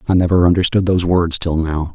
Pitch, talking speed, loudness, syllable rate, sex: 85 Hz, 215 wpm, -16 LUFS, 6.2 syllables/s, male